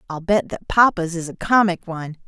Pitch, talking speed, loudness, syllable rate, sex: 180 Hz, 210 wpm, -19 LUFS, 5.5 syllables/s, female